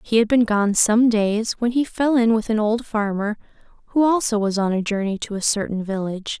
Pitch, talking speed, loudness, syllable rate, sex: 220 Hz, 225 wpm, -20 LUFS, 5.3 syllables/s, female